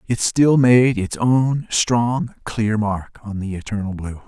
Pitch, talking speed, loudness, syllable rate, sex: 110 Hz, 170 wpm, -19 LUFS, 3.5 syllables/s, male